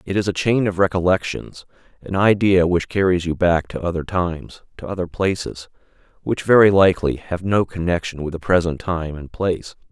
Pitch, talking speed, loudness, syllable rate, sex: 90 Hz, 170 wpm, -19 LUFS, 5.3 syllables/s, male